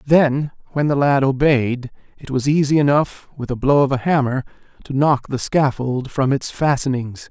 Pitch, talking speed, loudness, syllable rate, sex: 135 Hz, 180 wpm, -18 LUFS, 4.6 syllables/s, male